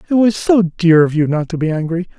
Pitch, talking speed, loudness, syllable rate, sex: 175 Hz, 275 wpm, -15 LUFS, 5.8 syllables/s, male